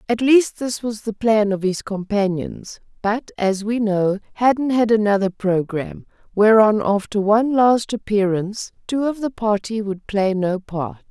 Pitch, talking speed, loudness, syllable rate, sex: 210 Hz, 160 wpm, -19 LUFS, 4.4 syllables/s, female